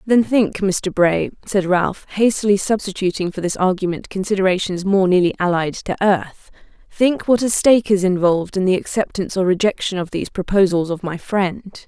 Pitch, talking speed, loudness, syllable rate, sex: 190 Hz, 170 wpm, -18 LUFS, 5.3 syllables/s, female